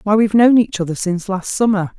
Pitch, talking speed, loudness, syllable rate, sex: 200 Hz, 240 wpm, -16 LUFS, 6.4 syllables/s, female